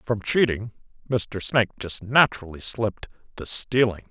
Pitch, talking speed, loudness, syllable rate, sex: 110 Hz, 130 wpm, -23 LUFS, 4.9 syllables/s, male